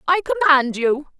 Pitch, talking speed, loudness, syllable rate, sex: 300 Hz, 150 wpm, -17 LUFS, 5.6 syllables/s, female